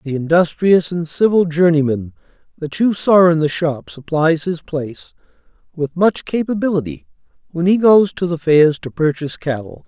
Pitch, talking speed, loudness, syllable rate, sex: 165 Hz, 160 wpm, -16 LUFS, 4.9 syllables/s, male